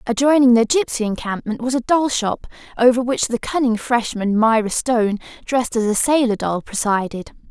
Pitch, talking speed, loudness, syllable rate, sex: 235 Hz, 170 wpm, -18 LUFS, 5.1 syllables/s, female